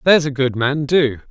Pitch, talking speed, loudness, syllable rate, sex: 140 Hz, 230 wpm, -17 LUFS, 5.4 syllables/s, male